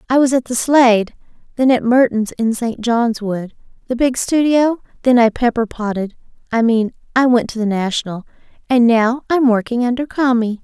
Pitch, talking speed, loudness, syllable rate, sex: 240 Hz, 170 wpm, -16 LUFS, 5.0 syllables/s, female